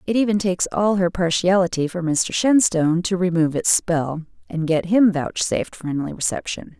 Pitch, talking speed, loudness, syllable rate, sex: 180 Hz, 170 wpm, -20 LUFS, 5.1 syllables/s, female